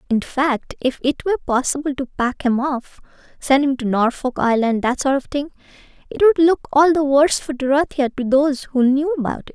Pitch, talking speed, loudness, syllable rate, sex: 275 Hz, 190 wpm, -18 LUFS, 5.5 syllables/s, female